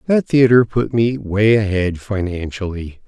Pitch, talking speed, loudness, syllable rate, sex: 105 Hz, 135 wpm, -17 LUFS, 4.2 syllables/s, male